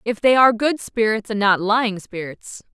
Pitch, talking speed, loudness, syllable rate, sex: 220 Hz, 195 wpm, -18 LUFS, 5.1 syllables/s, female